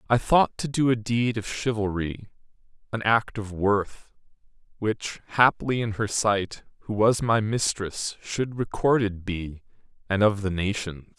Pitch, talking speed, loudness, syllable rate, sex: 105 Hz, 150 wpm, -25 LUFS, 3.9 syllables/s, male